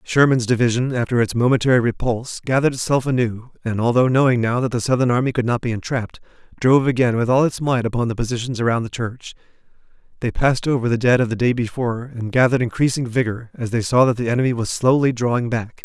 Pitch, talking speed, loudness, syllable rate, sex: 120 Hz, 210 wpm, -19 LUFS, 6.6 syllables/s, male